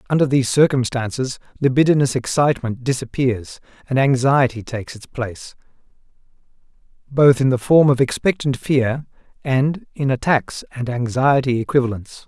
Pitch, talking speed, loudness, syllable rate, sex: 130 Hz, 115 wpm, -18 LUFS, 5.2 syllables/s, male